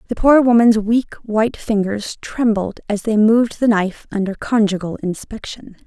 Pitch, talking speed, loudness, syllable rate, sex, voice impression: 215 Hz, 155 wpm, -17 LUFS, 4.9 syllables/s, female, feminine, adult-like, tensed, powerful, hard, raspy, calm, reassuring, elegant, slightly strict, slightly sharp